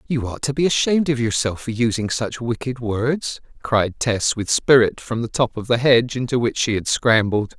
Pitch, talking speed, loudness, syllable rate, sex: 120 Hz, 215 wpm, -20 LUFS, 5.0 syllables/s, male